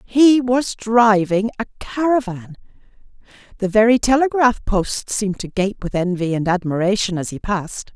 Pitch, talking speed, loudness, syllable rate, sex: 210 Hz, 145 wpm, -18 LUFS, 4.7 syllables/s, female